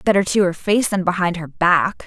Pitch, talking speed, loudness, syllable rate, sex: 180 Hz, 235 wpm, -18 LUFS, 5.1 syllables/s, female